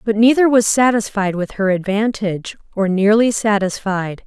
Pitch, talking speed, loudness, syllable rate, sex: 210 Hz, 140 wpm, -16 LUFS, 4.7 syllables/s, female